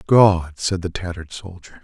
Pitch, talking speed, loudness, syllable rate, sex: 90 Hz, 165 wpm, -20 LUFS, 4.9 syllables/s, male